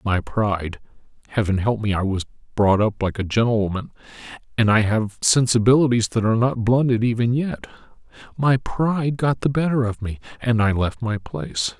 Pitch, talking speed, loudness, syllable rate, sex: 115 Hz, 170 wpm, -21 LUFS, 3.6 syllables/s, male